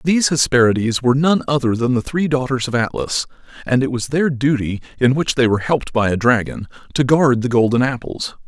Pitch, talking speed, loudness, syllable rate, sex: 130 Hz, 205 wpm, -17 LUFS, 5.8 syllables/s, male